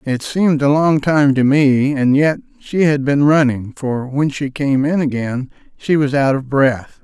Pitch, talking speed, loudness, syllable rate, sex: 140 Hz, 205 wpm, -15 LUFS, 4.2 syllables/s, male